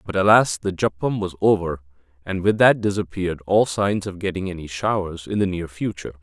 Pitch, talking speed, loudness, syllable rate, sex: 95 Hz, 195 wpm, -21 LUFS, 5.7 syllables/s, male